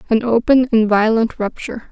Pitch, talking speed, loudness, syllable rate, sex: 225 Hz, 155 wpm, -15 LUFS, 5.4 syllables/s, female